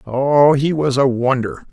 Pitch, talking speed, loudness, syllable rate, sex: 135 Hz, 175 wpm, -15 LUFS, 3.9 syllables/s, male